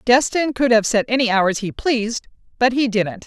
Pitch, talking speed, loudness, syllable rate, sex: 230 Hz, 200 wpm, -18 LUFS, 4.9 syllables/s, female